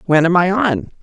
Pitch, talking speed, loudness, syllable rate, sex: 185 Hz, 235 wpm, -15 LUFS, 4.9 syllables/s, female